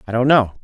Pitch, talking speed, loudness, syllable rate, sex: 120 Hz, 285 wpm, -15 LUFS, 6.8 syllables/s, male